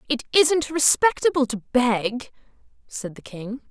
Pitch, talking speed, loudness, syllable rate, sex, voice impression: 260 Hz, 130 wpm, -21 LUFS, 4.0 syllables/s, female, feminine, slightly young, slightly bright, slightly cute, friendly